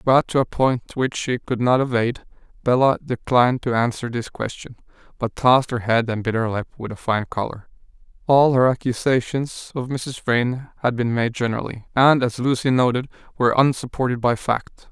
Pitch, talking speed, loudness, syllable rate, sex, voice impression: 125 Hz, 180 wpm, -21 LUFS, 5.2 syllables/s, male, masculine, adult-like, relaxed, weak, dark, muffled, raspy, slightly intellectual, slightly sincere, kind, modest